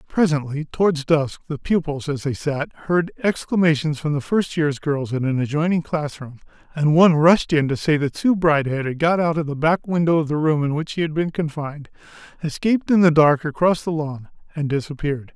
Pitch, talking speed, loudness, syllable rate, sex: 155 Hz, 205 wpm, -20 LUFS, 5.5 syllables/s, male